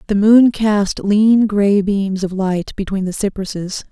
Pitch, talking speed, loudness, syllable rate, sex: 200 Hz, 170 wpm, -15 LUFS, 3.9 syllables/s, female